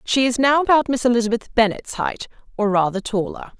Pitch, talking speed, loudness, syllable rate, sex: 235 Hz, 185 wpm, -19 LUFS, 5.7 syllables/s, female